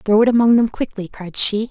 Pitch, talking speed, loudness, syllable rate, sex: 215 Hz, 245 wpm, -16 LUFS, 5.4 syllables/s, female